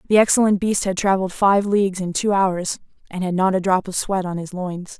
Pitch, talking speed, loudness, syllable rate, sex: 190 Hz, 240 wpm, -20 LUFS, 5.6 syllables/s, female